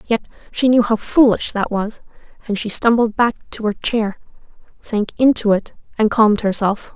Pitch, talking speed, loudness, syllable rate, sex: 220 Hz, 175 wpm, -17 LUFS, 4.7 syllables/s, female